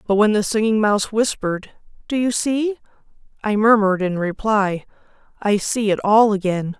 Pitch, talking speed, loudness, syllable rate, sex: 210 Hz, 160 wpm, -19 LUFS, 5.1 syllables/s, female